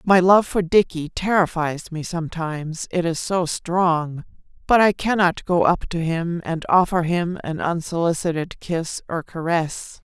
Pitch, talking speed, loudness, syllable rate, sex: 170 Hz, 155 wpm, -21 LUFS, 4.3 syllables/s, female